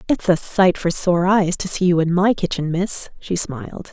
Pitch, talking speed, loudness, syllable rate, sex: 180 Hz, 230 wpm, -19 LUFS, 4.6 syllables/s, female